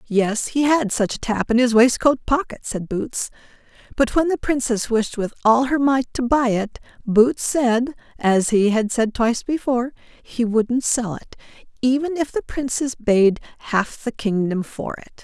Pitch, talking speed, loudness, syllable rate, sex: 240 Hz, 180 wpm, -20 LUFS, 4.2 syllables/s, female